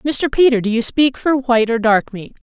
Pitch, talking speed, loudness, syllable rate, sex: 245 Hz, 240 wpm, -15 LUFS, 5.1 syllables/s, female